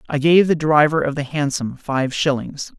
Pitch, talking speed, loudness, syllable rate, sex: 145 Hz, 195 wpm, -18 LUFS, 4.7 syllables/s, male